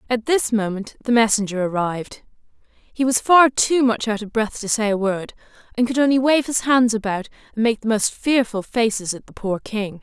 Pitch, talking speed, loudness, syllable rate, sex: 225 Hz, 210 wpm, -20 LUFS, 5.1 syllables/s, female